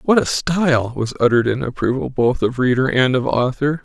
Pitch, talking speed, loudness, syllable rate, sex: 130 Hz, 205 wpm, -18 LUFS, 5.5 syllables/s, male